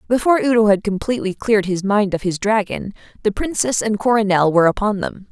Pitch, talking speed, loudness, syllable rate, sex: 210 Hz, 190 wpm, -18 LUFS, 6.3 syllables/s, female